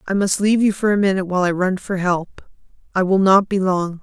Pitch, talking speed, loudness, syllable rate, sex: 190 Hz, 240 wpm, -18 LUFS, 6.1 syllables/s, female